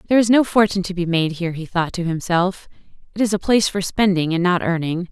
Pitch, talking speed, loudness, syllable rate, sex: 185 Hz, 245 wpm, -19 LUFS, 6.5 syllables/s, female